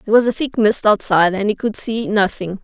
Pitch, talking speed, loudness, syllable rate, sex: 210 Hz, 250 wpm, -17 LUFS, 5.8 syllables/s, female